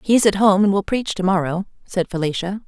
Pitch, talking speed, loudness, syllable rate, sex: 195 Hz, 225 wpm, -19 LUFS, 6.0 syllables/s, female